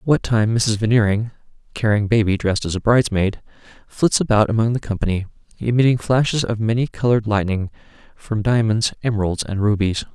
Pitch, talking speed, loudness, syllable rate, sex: 110 Hz, 155 wpm, -19 LUFS, 5.8 syllables/s, male